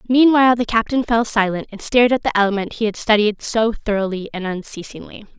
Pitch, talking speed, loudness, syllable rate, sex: 215 Hz, 190 wpm, -18 LUFS, 6.1 syllables/s, female